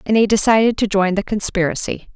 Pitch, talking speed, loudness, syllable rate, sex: 205 Hz, 195 wpm, -17 LUFS, 6.1 syllables/s, female